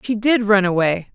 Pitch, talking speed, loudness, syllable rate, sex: 205 Hz, 210 wpm, -17 LUFS, 4.9 syllables/s, female